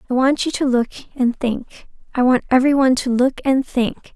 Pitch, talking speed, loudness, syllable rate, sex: 255 Hz, 215 wpm, -18 LUFS, 5.4 syllables/s, female